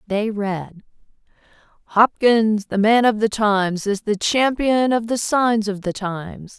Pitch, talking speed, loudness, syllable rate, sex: 215 Hz, 155 wpm, -19 LUFS, 3.9 syllables/s, female